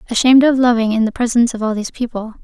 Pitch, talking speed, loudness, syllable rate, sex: 235 Hz, 245 wpm, -15 LUFS, 7.8 syllables/s, female